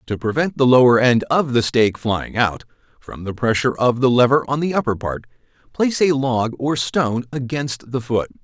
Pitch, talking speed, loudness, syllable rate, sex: 125 Hz, 200 wpm, -18 LUFS, 5.3 syllables/s, male